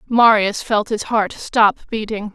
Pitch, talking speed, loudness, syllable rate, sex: 215 Hz, 155 wpm, -17 LUFS, 3.8 syllables/s, female